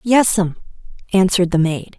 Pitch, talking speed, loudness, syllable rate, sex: 190 Hz, 120 wpm, -17 LUFS, 5.9 syllables/s, female